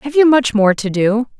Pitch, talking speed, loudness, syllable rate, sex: 240 Hz, 260 wpm, -14 LUFS, 4.9 syllables/s, female